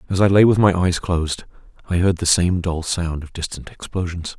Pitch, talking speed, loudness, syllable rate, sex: 90 Hz, 220 wpm, -19 LUFS, 5.3 syllables/s, male